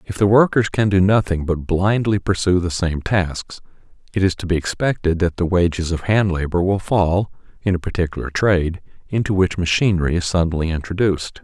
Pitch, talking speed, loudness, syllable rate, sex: 90 Hz, 185 wpm, -19 LUFS, 5.5 syllables/s, male